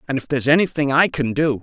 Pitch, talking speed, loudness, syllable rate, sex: 140 Hz, 260 wpm, -18 LUFS, 6.8 syllables/s, male